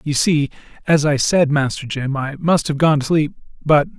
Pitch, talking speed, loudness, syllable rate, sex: 150 Hz, 210 wpm, -18 LUFS, 4.9 syllables/s, male